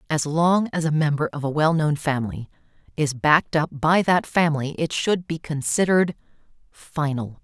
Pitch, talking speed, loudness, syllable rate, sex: 155 Hz, 155 wpm, -22 LUFS, 5.0 syllables/s, female